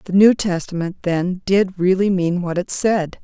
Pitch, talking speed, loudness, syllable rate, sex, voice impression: 185 Hz, 185 wpm, -18 LUFS, 4.3 syllables/s, female, feminine, adult-like, slightly relaxed, bright, slightly raspy, intellectual, friendly, slightly lively, kind